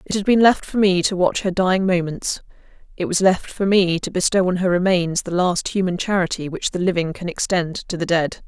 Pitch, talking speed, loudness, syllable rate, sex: 180 Hz, 235 wpm, -19 LUFS, 5.4 syllables/s, female